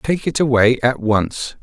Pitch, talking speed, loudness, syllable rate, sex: 125 Hz, 185 wpm, -17 LUFS, 3.9 syllables/s, male